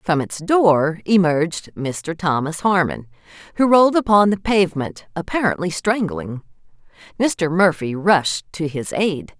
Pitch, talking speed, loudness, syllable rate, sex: 170 Hz, 130 wpm, -19 LUFS, 4.2 syllables/s, female